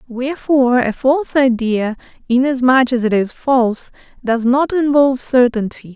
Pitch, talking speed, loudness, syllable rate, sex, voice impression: 255 Hz, 130 wpm, -15 LUFS, 4.9 syllables/s, female, feminine, middle-aged, slightly relaxed, bright, soft, halting, calm, friendly, reassuring, lively, kind, slightly modest